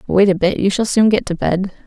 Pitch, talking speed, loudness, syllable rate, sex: 195 Hz, 290 wpm, -16 LUFS, 5.7 syllables/s, female